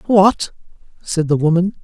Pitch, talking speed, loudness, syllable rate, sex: 175 Hz, 130 wpm, -16 LUFS, 4.3 syllables/s, male